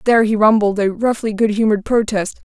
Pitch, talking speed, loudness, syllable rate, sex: 215 Hz, 190 wpm, -16 LUFS, 6.1 syllables/s, female